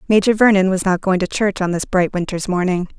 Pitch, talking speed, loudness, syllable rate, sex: 190 Hz, 240 wpm, -17 LUFS, 5.9 syllables/s, female